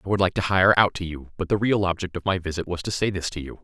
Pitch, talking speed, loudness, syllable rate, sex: 90 Hz, 345 wpm, -23 LUFS, 6.7 syllables/s, male